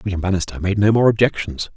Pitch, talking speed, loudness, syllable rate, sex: 100 Hz, 205 wpm, -18 LUFS, 6.5 syllables/s, male